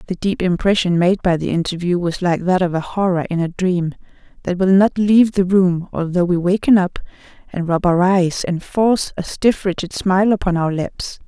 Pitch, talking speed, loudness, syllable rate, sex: 180 Hz, 210 wpm, -17 LUFS, 5.1 syllables/s, female